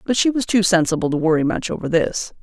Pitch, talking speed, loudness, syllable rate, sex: 185 Hz, 245 wpm, -19 LUFS, 6.3 syllables/s, female